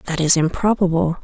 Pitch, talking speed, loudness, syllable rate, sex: 175 Hz, 145 wpm, -17 LUFS, 5.2 syllables/s, female